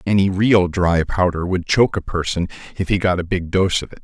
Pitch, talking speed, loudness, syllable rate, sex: 90 Hz, 240 wpm, -18 LUFS, 5.5 syllables/s, male